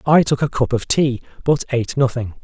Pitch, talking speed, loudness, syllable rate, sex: 130 Hz, 220 wpm, -18 LUFS, 5.6 syllables/s, male